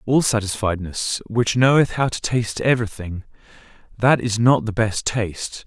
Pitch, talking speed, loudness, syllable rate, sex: 115 Hz, 140 wpm, -20 LUFS, 4.9 syllables/s, male